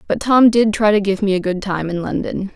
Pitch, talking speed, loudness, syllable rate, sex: 205 Hz, 280 wpm, -16 LUFS, 5.5 syllables/s, female